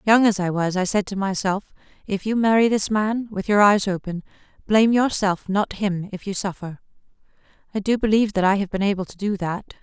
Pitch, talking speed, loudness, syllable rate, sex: 200 Hz, 200 wpm, -21 LUFS, 5.6 syllables/s, female